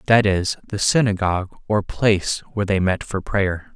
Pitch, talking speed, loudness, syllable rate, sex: 100 Hz, 175 wpm, -20 LUFS, 5.0 syllables/s, male